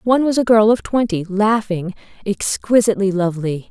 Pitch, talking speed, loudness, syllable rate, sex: 205 Hz, 145 wpm, -17 LUFS, 5.4 syllables/s, female